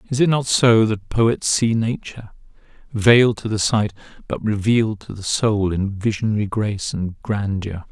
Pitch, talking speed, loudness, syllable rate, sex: 110 Hz, 165 wpm, -19 LUFS, 4.7 syllables/s, male